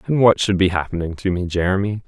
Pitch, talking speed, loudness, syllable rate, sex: 95 Hz, 230 wpm, -19 LUFS, 6.3 syllables/s, male